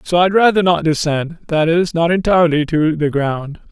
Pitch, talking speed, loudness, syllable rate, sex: 165 Hz, 180 wpm, -15 LUFS, 5.0 syllables/s, male